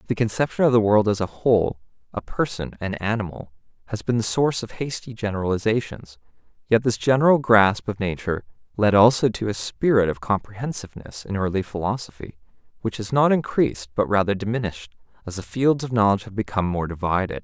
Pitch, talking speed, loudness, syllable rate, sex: 105 Hz, 175 wpm, -22 LUFS, 6.1 syllables/s, male